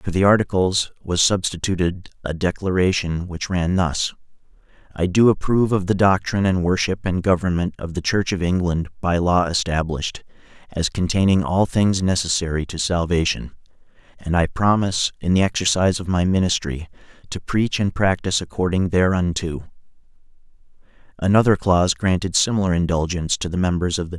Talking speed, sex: 155 wpm, male